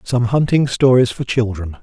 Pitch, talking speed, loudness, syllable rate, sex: 120 Hz, 165 wpm, -16 LUFS, 4.6 syllables/s, male